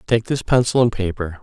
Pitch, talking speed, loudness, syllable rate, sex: 105 Hz, 210 wpm, -19 LUFS, 5.6 syllables/s, male